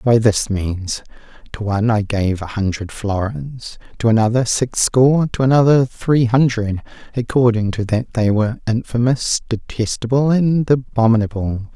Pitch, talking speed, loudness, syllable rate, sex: 115 Hz, 140 wpm, -17 LUFS, 4.5 syllables/s, male